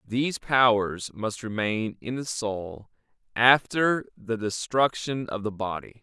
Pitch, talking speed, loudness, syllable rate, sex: 115 Hz, 130 wpm, -26 LUFS, 3.8 syllables/s, male